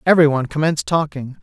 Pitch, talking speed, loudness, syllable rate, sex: 150 Hz, 125 wpm, -18 LUFS, 7.0 syllables/s, male